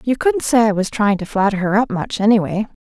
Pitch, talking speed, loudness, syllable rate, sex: 215 Hz, 255 wpm, -17 LUFS, 5.8 syllables/s, female